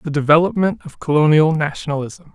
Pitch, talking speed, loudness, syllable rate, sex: 155 Hz, 130 wpm, -16 LUFS, 5.6 syllables/s, male